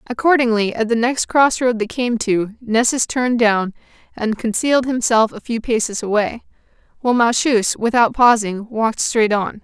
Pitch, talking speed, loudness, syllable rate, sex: 230 Hz, 155 wpm, -17 LUFS, 4.8 syllables/s, female